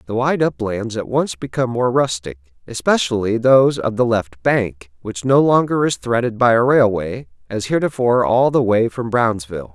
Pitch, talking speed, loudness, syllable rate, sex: 115 Hz, 180 wpm, -17 LUFS, 5.1 syllables/s, male